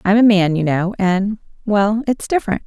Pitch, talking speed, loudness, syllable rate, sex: 200 Hz, 180 wpm, -17 LUFS, 4.9 syllables/s, female